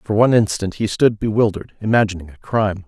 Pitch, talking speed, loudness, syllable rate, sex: 105 Hz, 165 wpm, -18 LUFS, 6.6 syllables/s, male